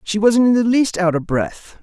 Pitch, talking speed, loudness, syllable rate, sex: 205 Hz, 260 wpm, -16 LUFS, 4.7 syllables/s, male